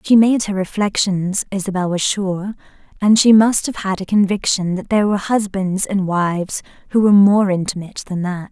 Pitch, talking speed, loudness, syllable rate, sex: 195 Hz, 185 wpm, -17 LUFS, 5.3 syllables/s, female